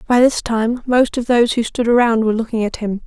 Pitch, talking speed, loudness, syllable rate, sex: 230 Hz, 255 wpm, -16 LUFS, 5.9 syllables/s, female